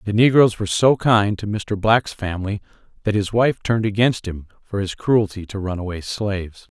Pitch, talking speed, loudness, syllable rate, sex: 105 Hz, 185 wpm, -20 LUFS, 5.2 syllables/s, male